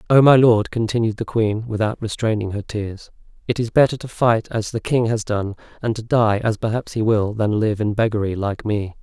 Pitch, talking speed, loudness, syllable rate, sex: 110 Hz, 220 wpm, -20 LUFS, 5.2 syllables/s, male